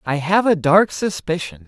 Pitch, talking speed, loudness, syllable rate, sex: 165 Hz, 180 wpm, -18 LUFS, 4.5 syllables/s, male